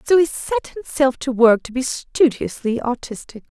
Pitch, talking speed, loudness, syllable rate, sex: 270 Hz, 165 wpm, -19 LUFS, 4.4 syllables/s, female